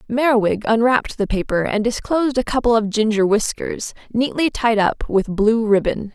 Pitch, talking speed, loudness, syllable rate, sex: 225 Hz, 165 wpm, -18 LUFS, 5.1 syllables/s, female